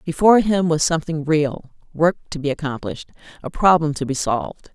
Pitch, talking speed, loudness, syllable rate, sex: 160 Hz, 150 wpm, -19 LUFS, 5.9 syllables/s, female